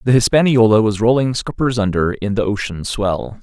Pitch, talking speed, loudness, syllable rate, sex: 110 Hz, 175 wpm, -16 LUFS, 5.2 syllables/s, male